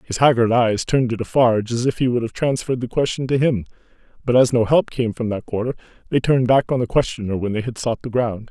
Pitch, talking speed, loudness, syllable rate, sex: 120 Hz, 255 wpm, -19 LUFS, 6.3 syllables/s, male